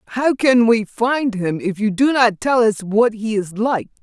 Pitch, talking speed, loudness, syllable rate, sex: 225 Hz, 225 wpm, -17 LUFS, 4.2 syllables/s, female